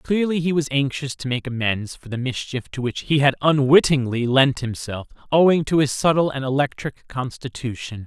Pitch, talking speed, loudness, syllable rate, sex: 135 Hz, 180 wpm, -21 LUFS, 5.1 syllables/s, male